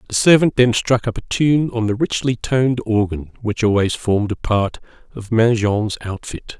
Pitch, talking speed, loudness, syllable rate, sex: 115 Hz, 180 wpm, -18 LUFS, 4.8 syllables/s, male